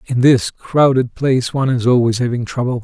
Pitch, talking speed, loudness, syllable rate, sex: 125 Hz, 190 wpm, -15 LUFS, 5.5 syllables/s, male